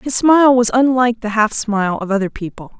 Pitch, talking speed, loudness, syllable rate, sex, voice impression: 230 Hz, 215 wpm, -15 LUFS, 6.0 syllables/s, female, very feminine, young, thin, slightly tensed, slightly weak, bright, soft, clear, fluent, slightly cute, cool, intellectual, very refreshing, sincere, slightly calm, very friendly, reassuring, unique, elegant, slightly wild, sweet, lively, slightly kind, slightly sharp, light